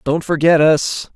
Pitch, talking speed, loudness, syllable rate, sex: 155 Hz, 155 wpm, -15 LUFS, 3.9 syllables/s, male